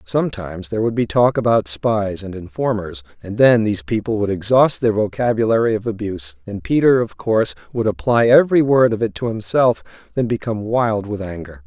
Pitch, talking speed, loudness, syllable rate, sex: 110 Hz, 185 wpm, -18 LUFS, 5.6 syllables/s, male